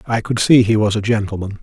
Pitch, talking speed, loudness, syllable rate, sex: 110 Hz, 260 wpm, -16 LUFS, 6.1 syllables/s, male